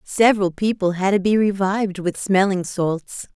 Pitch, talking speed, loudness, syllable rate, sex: 195 Hz, 160 wpm, -20 LUFS, 4.7 syllables/s, female